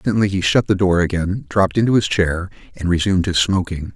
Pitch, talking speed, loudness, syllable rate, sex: 90 Hz, 215 wpm, -18 LUFS, 6.2 syllables/s, male